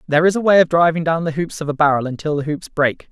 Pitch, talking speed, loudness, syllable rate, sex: 160 Hz, 310 wpm, -17 LUFS, 6.8 syllables/s, male